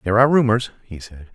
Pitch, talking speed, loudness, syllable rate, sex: 110 Hz, 225 wpm, -17 LUFS, 7.1 syllables/s, male